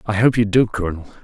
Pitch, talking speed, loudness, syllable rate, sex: 105 Hz, 245 wpm, -18 LUFS, 6.7 syllables/s, male